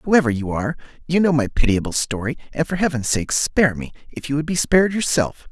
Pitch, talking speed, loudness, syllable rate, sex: 140 Hz, 220 wpm, -20 LUFS, 6.1 syllables/s, male